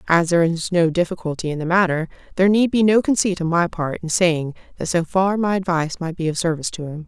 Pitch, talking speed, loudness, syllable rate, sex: 175 Hz, 245 wpm, -20 LUFS, 6.4 syllables/s, female